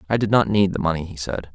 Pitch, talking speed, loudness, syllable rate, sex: 90 Hz, 310 wpm, -21 LUFS, 6.7 syllables/s, male